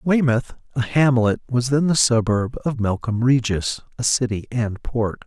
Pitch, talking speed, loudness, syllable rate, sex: 120 Hz, 160 wpm, -20 LUFS, 4.4 syllables/s, male